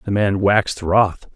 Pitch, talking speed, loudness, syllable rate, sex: 100 Hz, 175 wpm, -18 LUFS, 4.3 syllables/s, male